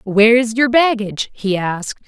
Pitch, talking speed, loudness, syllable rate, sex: 220 Hz, 145 wpm, -15 LUFS, 4.6 syllables/s, female